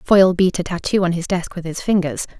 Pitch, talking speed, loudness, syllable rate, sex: 180 Hz, 250 wpm, -19 LUFS, 5.9 syllables/s, female